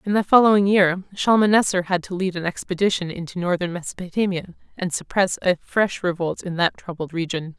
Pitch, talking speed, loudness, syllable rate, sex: 180 Hz, 175 wpm, -21 LUFS, 5.6 syllables/s, female